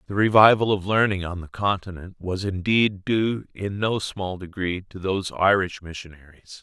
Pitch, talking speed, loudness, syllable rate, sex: 95 Hz, 165 wpm, -22 LUFS, 4.7 syllables/s, male